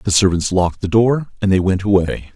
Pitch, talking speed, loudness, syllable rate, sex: 95 Hz, 230 wpm, -16 LUFS, 5.4 syllables/s, male